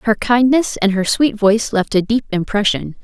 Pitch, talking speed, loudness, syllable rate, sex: 215 Hz, 200 wpm, -16 LUFS, 5.0 syllables/s, female